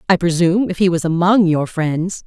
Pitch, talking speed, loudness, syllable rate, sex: 175 Hz, 210 wpm, -16 LUFS, 5.3 syllables/s, female